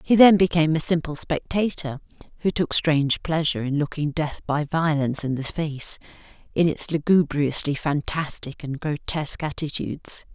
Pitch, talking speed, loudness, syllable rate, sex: 155 Hz, 145 wpm, -23 LUFS, 5.0 syllables/s, female